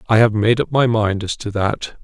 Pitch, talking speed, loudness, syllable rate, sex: 110 Hz, 265 wpm, -17 LUFS, 5.0 syllables/s, male